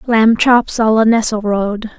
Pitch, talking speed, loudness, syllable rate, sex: 220 Hz, 150 wpm, -13 LUFS, 4.5 syllables/s, female